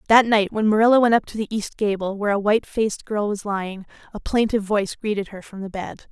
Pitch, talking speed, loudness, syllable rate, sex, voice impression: 210 Hz, 245 wpm, -21 LUFS, 6.5 syllables/s, female, feminine, adult-like, fluent, slightly friendly, elegant, slightly sweet